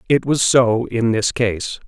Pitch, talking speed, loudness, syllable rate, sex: 115 Hz, 190 wpm, -17 LUFS, 3.7 syllables/s, male